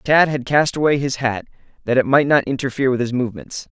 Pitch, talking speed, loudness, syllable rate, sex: 130 Hz, 220 wpm, -18 LUFS, 6.2 syllables/s, male